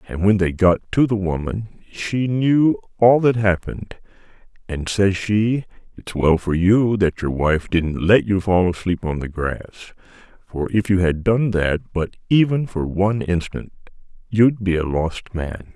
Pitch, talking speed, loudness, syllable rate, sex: 95 Hz, 175 wpm, -19 LUFS, 4.2 syllables/s, male